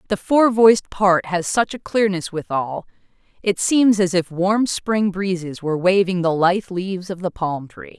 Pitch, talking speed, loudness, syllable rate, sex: 190 Hz, 190 wpm, -19 LUFS, 4.6 syllables/s, female